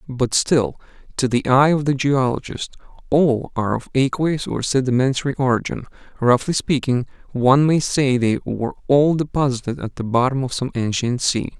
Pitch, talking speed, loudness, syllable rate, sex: 130 Hz, 160 wpm, -19 LUFS, 5.1 syllables/s, male